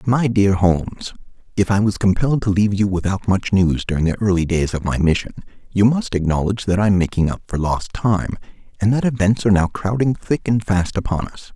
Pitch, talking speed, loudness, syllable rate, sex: 100 Hz, 220 wpm, -18 LUFS, 5.9 syllables/s, male